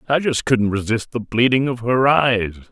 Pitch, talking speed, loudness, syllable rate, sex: 120 Hz, 200 wpm, -18 LUFS, 4.6 syllables/s, male